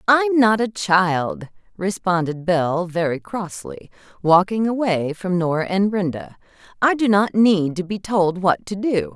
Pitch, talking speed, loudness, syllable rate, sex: 185 Hz, 155 wpm, -20 LUFS, 4.2 syllables/s, female